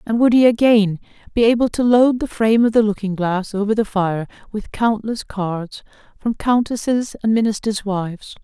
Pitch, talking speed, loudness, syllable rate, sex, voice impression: 215 Hz, 180 wpm, -18 LUFS, 5.0 syllables/s, female, feminine, middle-aged, tensed, powerful, clear, fluent, intellectual, friendly, elegant, lively, slightly kind